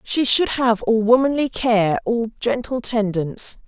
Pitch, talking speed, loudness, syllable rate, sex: 230 Hz, 145 wpm, -19 LUFS, 4.2 syllables/s, female